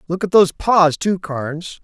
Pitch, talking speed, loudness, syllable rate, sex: 175 Hz, 195 wpm, -17 LUFS, 4.9 syllables/s, male